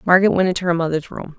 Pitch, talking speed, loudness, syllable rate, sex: 175 Hz, 260 wpm, -18 LUFS, 7.9 syllables/s, female